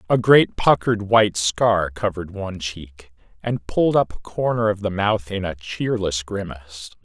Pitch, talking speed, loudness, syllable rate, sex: 100 Hz, 170 wpm, -20 LUFS, 4.8 syllables/s, male